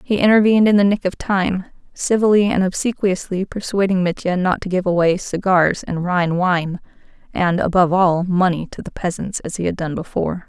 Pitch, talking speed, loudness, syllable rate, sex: 185 Hz, 185 wpm, -18 LUFS, 5.4 syllables/s, female